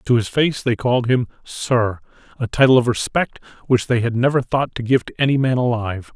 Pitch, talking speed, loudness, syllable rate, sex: 120 Hz, 215 wpm, -19 LUFS, 5.6 syllables/s, male